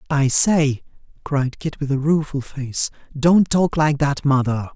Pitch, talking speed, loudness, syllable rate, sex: 145 Hz, 165 wpm, -19 LUFS, 3.9 syllables/s, male